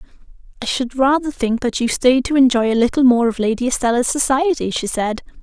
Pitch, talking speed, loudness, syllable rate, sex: 250 Hz, 200 wpm, -17 LUFS, 6.5 syllables/s, female